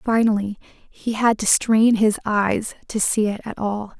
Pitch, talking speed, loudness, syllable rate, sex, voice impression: 215 Hz, 180 wpm, -20 LUFS, 4.0 syllables/s, female, very feminine, slightly young, thin, very tensed, powerful, bright, soft, clear, fluent, cute, intellectual, very refreshing, sincere, calm, very friendly, very reassuring, unique, elegant, wild, sweet, lively, kind, slightly intense, light